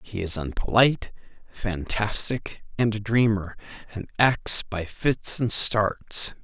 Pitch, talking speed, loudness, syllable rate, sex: 105 Hz, 120 wpm, -23 LUFS, 3.7 syllables/s, male